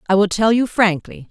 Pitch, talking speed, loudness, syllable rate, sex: 205 Hz, 230 wpm, -16 LUFS, 5.3 syllables/s, female